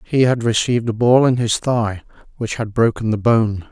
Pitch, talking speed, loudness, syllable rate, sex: 115 Hz, 210 wpm, -17 LUFS, 5.0 syllables/s, male